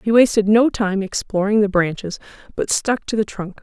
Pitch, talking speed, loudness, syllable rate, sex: 205 Hz, 200 wpm, -18 LUFS, 5.0 syllables/s, female